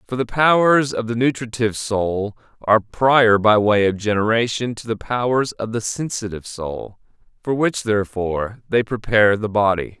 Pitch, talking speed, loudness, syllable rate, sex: 110 Hz, 160 wpm, -19 LUFS, 5.0 syllables/s, male